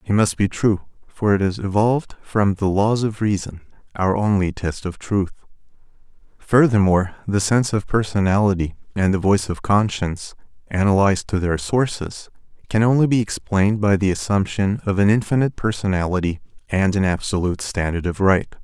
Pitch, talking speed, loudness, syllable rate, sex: 100 Hz, 160 wpm, -20 LUFS, 5.5 syllables/s, male